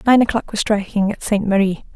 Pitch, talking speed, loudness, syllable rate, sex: 210 Hz, 215 wpm, -18 LUFS, 5.7 syllables/s, female